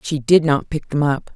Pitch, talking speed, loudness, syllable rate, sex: 150 Hz, 265 wpm, -18 LUFS, 4.8 syllables/s, female